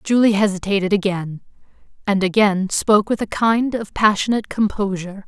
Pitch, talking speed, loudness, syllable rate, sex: 205 Hz, 135 wpm, -18 LUFS, 5.5 syllables/s, female